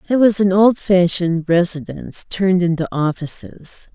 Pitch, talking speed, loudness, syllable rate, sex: 180 Hz, 120 wpm, -17 LUFS, 4.9 syllables/s, female